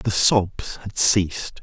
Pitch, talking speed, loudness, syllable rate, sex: 95 Hz, 150 wpm, -20 LUFS, 3.9 syllables/s, male